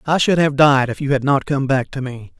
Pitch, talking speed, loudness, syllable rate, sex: 140 Hz, 300 wpm, -17 LUFS, 5.4 syllables/s, male